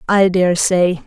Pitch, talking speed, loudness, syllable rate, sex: 180 Hz, 170 wpm, -14 LUFS, 3.3 syllables/s, female